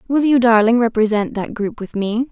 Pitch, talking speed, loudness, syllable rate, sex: 230 Hz, 210 wpm, -16 LUFS, 5.2 syllables/s, female